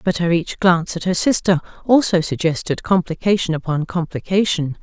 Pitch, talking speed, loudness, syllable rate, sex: 175 Hz, 150 wpm, -18 LUFS, 5.4 syllables/s, female